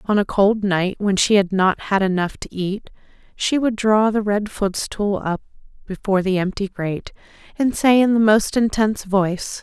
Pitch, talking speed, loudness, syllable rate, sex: 205 Hz, 185 wpm, -19 LUFS, 4.8 syllables/s, female